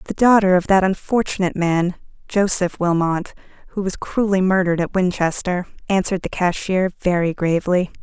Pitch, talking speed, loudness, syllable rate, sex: 185 Hz, 140 wpm, -19 LUFS, 5.5 syllables/s, female